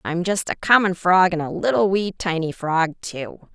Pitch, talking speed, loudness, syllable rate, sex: 175 Hz, 205 wpm, -20 LUFS, 4.6 syllables/s, female